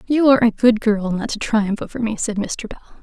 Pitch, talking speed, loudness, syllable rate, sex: 220 Hz, 260 wpm, -19 LUFS, 5.6 syllables/s, female